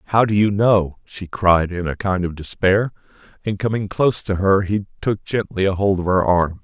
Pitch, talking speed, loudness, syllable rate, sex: 95 Hz, 210 wpm, -19 LUFS, 4.9 syllables/s, male